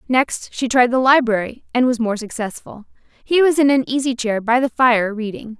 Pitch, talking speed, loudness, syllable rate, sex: 245 Hz, 205 wpm, -17 LUFS, 5.0 syllables/s, female